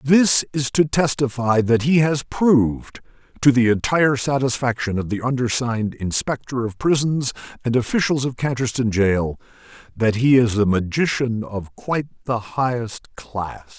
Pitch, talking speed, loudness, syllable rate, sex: 125 Hz, 145 wpm, -20 LUFS, 4.7 syllables/s, male